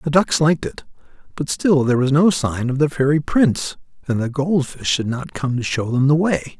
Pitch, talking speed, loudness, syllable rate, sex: 140 Hz, 235 wpm, -19 LUFS, 5.3 syllables/s, male